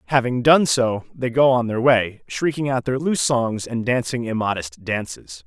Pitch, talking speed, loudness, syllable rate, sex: 120 Hz, 185 wpm, -20 LUFS, 4.7 syllables/s, male